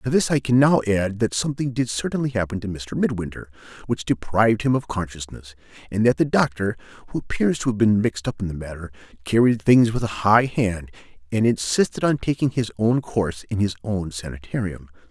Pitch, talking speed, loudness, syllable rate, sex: 105 Hz, 200 wpm, -22 LUFS, 5.7 syllables/s, male